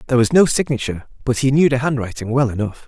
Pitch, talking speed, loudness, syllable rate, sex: 125 Hz, 230 wpm, -18 LUFS, 7.1 syllables/s, male